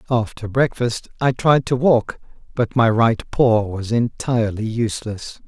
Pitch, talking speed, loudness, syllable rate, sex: 115 Hz, 145 wpm, -19 LUFS, 4.2 syllables/s, male